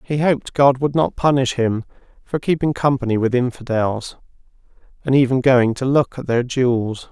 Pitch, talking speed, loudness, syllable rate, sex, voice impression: 130 Hz, 170 wpm, -18 LUFS, 4.9 syllables/s, male, very masculine, very middle-aged, very thick, relaxed, weak, dark, soft, muffled, slightly halting, slightly cool, intellectual, slightly refreshing, sincere, very calm, mature, slightly friendly, slightly reassuring, very unique, slightly elegant, wild, slightly lively, kind, modest, slightly light